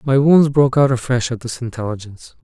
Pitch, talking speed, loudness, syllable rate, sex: 125 Hz, 195 wpm, -16 LUFS, 6.1 syllables/s, male